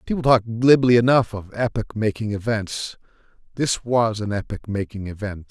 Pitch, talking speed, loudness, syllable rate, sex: 110 Hz, 155 wpm, -21 LUFS, 5.1 syllables/s, male